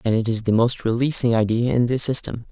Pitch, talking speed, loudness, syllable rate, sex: 120 Hz, 240 wpm, -20 LUFS, 5.9 syllables/s, male